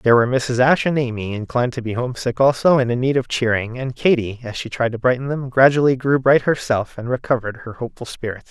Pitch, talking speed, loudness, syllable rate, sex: 125 Hz, 240 wpm, -19 LUFS, 6.6 syllables/s, male